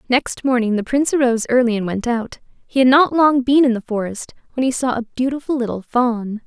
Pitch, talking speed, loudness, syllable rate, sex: 245 Hz, 225 wpm, -18 LUFS, 5.7 syllables/s, female